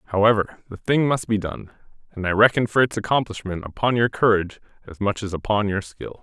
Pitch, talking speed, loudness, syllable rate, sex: 105 Hz, 200 wpm, -21 LUFS, 6.0 syllables/s, male